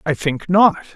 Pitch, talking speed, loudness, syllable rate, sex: 170 Hz, 190 wpm, -16 LUFS, 4.4 syllables/s, male